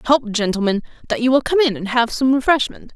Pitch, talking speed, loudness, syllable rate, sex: 245 Hz, 245 wpm, -18 LUFS, 6.2 syllables/s, female